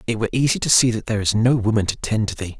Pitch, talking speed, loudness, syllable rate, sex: 110 Hz, 325 wpm, -19 LUFS, 7.5 syllables/s, male